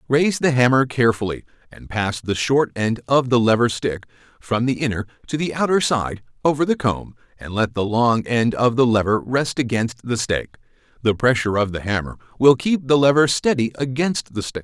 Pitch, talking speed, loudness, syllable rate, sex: 120 Hz, 195 wpm, -20 LUFS, 5.5 syllables/s, male